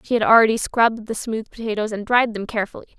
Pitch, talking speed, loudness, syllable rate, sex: 220 Hz, 220 wpm, -20 LUFS, 6.6 syllables/s, female